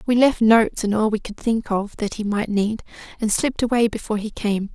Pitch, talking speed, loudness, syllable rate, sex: 215 Hz, 240 wpm, -21 LUFS, 5.7 syllables/s, female